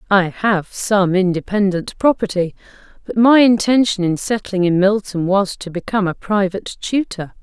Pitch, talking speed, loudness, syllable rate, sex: 200 Hz, 145 wpm, -17 LUFS, 4.8 syllables/s, female